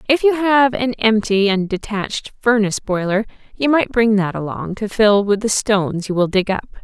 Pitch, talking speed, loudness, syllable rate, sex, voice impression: 215 Hz, 200 wpm, -17 LUFS, 5.0 syllables/s, female, very feminine, adult-like, very thin, tensed, slightly powerful, very bright, very soft, very clear, very fluent, cool, very intellectual, very refreshing, sincere, calm, very friendly, very reassuring, very unique, very elegant, wild, very sweet, very lively, very kind, slightly intense, slightly light